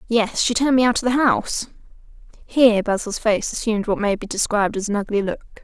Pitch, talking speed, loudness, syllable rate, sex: 220 Hz, 215 wpm, -20 LUFS, 6.4 syllables/s, female